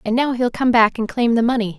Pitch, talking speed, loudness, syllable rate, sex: 235 Hz, 305 wpm, -17 LUFS, 5.9 syllables/s, female